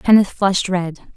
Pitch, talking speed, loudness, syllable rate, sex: 190 Hz, 155 wpm, -17 LUFS, 4.9 syllables/s, female